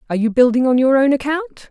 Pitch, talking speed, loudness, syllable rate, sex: 265 Hz, 245 wpm, -15 LUFS, 6.6 syllables/s, female